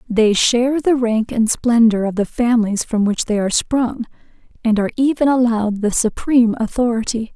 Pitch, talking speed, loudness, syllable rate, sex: 230 Hz, 170 wpm, -17 LUFS, 5.4 syllables/s, female